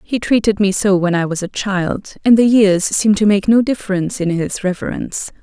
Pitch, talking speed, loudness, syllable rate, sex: 200 Hz, 220 wpm, -15 LUFS, 5.2 syllables/s, female